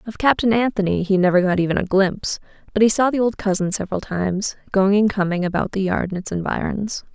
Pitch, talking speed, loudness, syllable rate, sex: 200 Hz, 220 wpm, -20 LUFS, 6.2 syllables/s, female